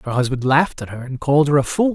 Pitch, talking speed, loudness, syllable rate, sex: 140 Hz, 310 wpm, -18 LUFS, 7.0 syllables/s, male